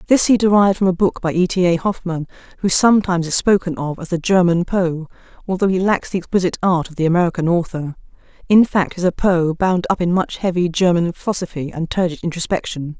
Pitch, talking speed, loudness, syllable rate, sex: 180 Hz, 205 wpm, -17 LUFS, 6.1 syllables/s, female